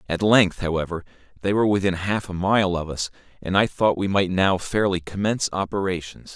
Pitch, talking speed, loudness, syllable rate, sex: 95 Hz, 190 wpm, -22 LUFS, 5.5 syllables/s, male